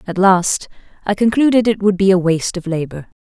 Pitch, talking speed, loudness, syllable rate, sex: 195 Hz, 205 wpm, -15 LUFS, 5.7 syllables/s, female